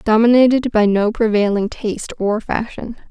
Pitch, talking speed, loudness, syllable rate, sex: 220 Hz, 135 wpm, -16 LUFS, 4.8 syllables/s, female